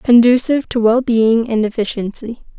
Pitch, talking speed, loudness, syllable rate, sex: 230 Hz, 115 wpm, -15 LUFS, 5.2 syllables/s, female